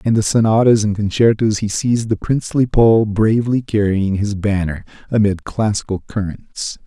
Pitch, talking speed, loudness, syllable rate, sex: 105 Hz, 150 wpm, -17 LUFS, 4.8 syllables/s, male